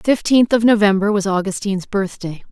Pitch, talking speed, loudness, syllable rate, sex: 205 Hz, 165 wpm, -16 LUFS, 6.0 syllables/s, female